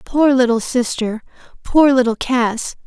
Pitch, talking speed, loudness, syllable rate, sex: 250 Hz, 105 wpm, -16 LUFS, 4.0 syllables/s, female